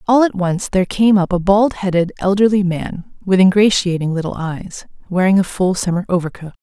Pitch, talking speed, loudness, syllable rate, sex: 190 Hz, 180 wpm, -16 LUFS, 5.4 syllables/s, female